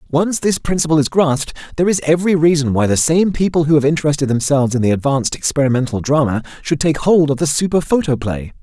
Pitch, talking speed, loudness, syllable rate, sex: 150 Hz, 200 wpm, -16 LUFS, 6.5 syllables/s, male